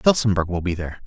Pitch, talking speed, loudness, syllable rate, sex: 95 Hz, 225 wpm, -22 LUFS, 6.9 syllables/s, male